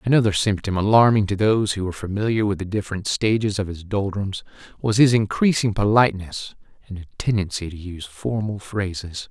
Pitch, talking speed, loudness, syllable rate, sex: 100 Hz, 170 wpm, -21 LUFS, 5.8 syllables/s, male